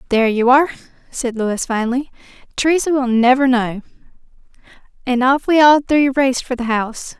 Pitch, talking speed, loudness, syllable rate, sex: 255 Hz, 160 wpm, -16 LUFS, 5.8 syllables/s, female